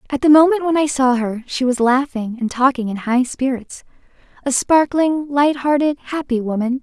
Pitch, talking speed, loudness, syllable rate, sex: 265 Hz, 165 wpm, -17 LUFS, 5.0 syllables/s, female